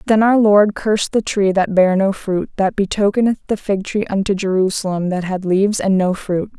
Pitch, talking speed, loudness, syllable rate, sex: 200 Hz, 210 wpm, -17 LUFS, 5.2 syllables/s, female